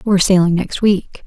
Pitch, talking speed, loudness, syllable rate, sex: 190 Hz, 190 wpm, -15 LUFS, 5.2 syllables/s, female